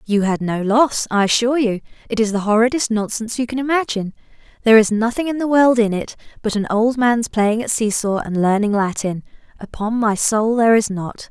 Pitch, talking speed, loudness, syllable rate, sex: 225 Hz, 210 wpm, -18 LUFS, 5.6 syllables/s, female